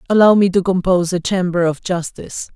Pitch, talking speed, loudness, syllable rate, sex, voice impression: 185 Hz, 190 wpm, -16 LUFS, 6.1 syllables/s, male, very masculine, adult-like, thick, tensed, slightly powerful, dark, hard, muffled, fluent, cool, intellectual, slightly refreshing, sincere, very calm, very mature, very friendly, very reassuring, very unique, elegant, slightly wild, sweet, lively, very kind, modest